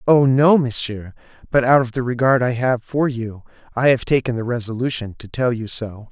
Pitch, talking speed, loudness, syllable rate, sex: 125 Hz, 205 wpm, -19 LUFS, 5.1 syllables/s, male